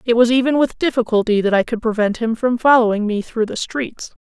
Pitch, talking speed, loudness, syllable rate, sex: 235 Hz, 225 wpm, -17 LUFS, 5.7 syllables/s, female